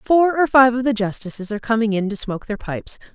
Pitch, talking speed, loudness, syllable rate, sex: 230 Hz, 250 wpm, -19 LUFS, 6.6 syllables/s, female